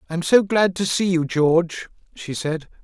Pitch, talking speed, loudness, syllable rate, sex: 170 Hz, 210 wpm, -20 LUFS, 4.9 syllables/s, male